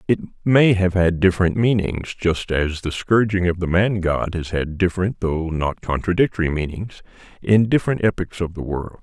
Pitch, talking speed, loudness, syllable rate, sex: 90 Hz, 180 wpm, -20 LUFS, 5.0 syllables/s, male